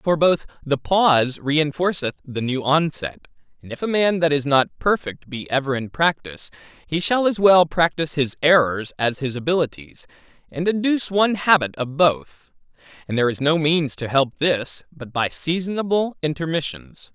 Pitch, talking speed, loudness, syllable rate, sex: 150 Hz, 170 wpm, -20 LUFS, 5.0 syllables/s, male